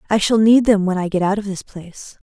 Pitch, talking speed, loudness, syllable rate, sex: 200 Hz, 290 wpm, -16 LUFS, 6.0 syllables/s, female